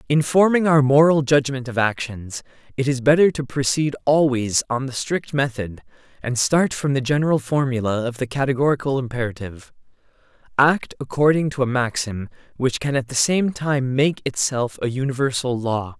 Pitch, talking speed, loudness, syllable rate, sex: 135 Hz, 160 wpm, -20 LUFS, 5.2 syllables/s, male